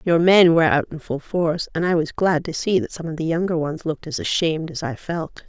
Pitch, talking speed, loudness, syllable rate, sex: 165 Hz, 275 wpm, -21 LUFS, 5.9 syllables/s, female